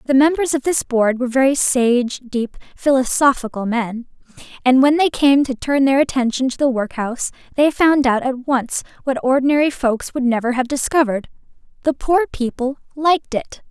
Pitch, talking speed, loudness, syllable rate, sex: 265 Hz, 165 wpm, -18 LUFS, 5.1 syllables/s, female